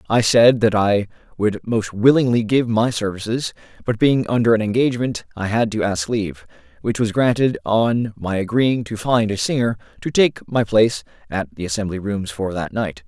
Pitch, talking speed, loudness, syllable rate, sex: 110 Hz, 190 wpm, -19 LUFS, 5.0 syllables/s, male